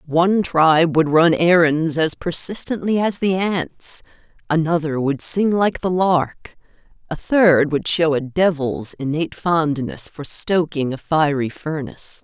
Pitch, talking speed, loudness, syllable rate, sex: 165 Hz, 140 wpm, -18 LUFS, 4.1 syllables/s, female